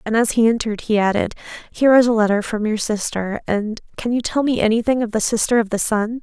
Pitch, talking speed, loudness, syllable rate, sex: 220 Hz, 230 wpm, -18 LUFS, 6.2 syllables/s, female